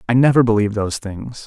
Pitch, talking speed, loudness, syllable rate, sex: 110 Hz, 205 wpm, -17 LUFS, 6.9 syllables/s, male